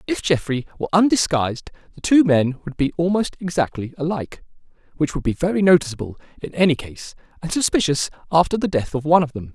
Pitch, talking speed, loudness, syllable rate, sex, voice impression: 160 Hz, 180 wpm, -20 LUFS, 6.4 syllables/s, male, masculine, adult-like, tensed, slightly powerful, bright, clear, fluent, intellectual, friendly, wild, lively, slightly intense